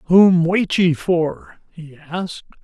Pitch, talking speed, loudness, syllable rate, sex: 170 Hz, 135 wpm, -17 LUFS, 3.3 syllables/s, male